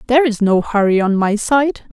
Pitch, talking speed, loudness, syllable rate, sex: 225 Hz, 210 wpm, -15 LUFS, 5.1 syllables/s, female